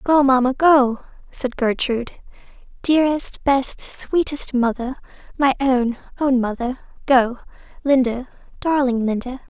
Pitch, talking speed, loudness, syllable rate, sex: 260 Hz, 100 wpm, -19 LUFS, 4.1 syllables/s, female